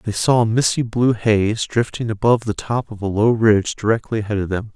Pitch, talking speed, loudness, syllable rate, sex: 110 Hz, 225 wpm, -18 LUFS, 5.5 syllables/s, male